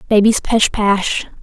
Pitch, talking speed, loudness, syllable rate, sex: 210 Hz, 125 wpm, -15 LUFS, 3.6 syllables/s, female